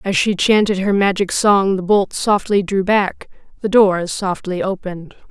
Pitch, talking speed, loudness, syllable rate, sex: 195 Hz, 170 wpm, -16 LUFS, 4.4 syllables/s, female